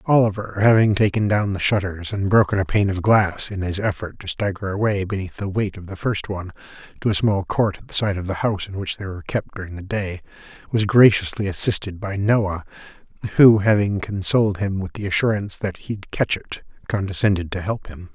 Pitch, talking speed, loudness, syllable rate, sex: 100 Hz, 210 wpm, -21 LUFS, 5.7 syllables/s, male